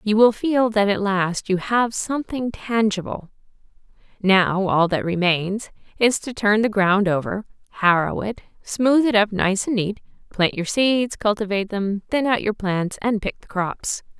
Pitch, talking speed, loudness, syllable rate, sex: 205 Hz, 175 wpm, -21 LUFS, 4.3 syllables/s, female